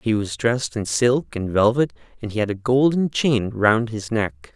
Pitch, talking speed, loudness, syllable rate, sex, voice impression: 115 Hz, 210 wpm, -21 LUFS, 4.5 syllables/s, male, masculine, adult-like, cool, slightly refreshing, sincere, calm, slightly sweet